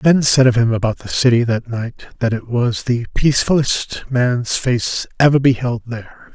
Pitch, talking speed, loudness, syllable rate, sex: 120 Hz, 180 wpm, -16 LUFS, 4.6 syllables/s, male